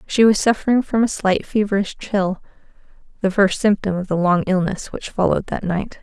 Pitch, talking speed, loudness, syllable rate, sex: 200 Hz, 180 wpm, -19 LUFS, 5.3 syllables/s, female